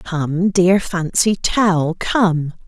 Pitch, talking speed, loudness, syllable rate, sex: 175 Hz, 110 wpm, -17 LUFS, 2.4 syllables/s, female